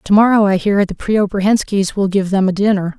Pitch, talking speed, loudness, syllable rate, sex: 200 Hz, 200 wpm, -15 LUFS, 5.5 syllables/s, female